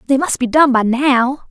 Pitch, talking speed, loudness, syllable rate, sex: 260 Hz, 240 wpm, -14 LUFS, 4.8 syllables/s, female